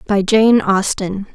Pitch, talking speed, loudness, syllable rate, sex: 205 Hz, 135 wpm, -15 LUFS, 3.5 syllables/s, female